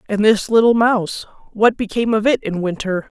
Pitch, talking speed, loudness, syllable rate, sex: 215 Hz, 190 wpm, -17 LUFS, 5.6 syllables/s, female